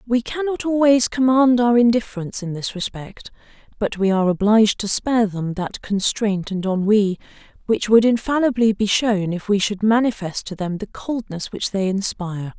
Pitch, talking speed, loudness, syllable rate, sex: 215 Hz, 170 wpm, -19 LUFS, 5.1 syllables/s, female